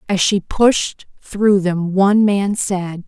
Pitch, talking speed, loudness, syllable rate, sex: 195 Hz, 155 wpm, -16 LUFS, 3.3 syllables/s, female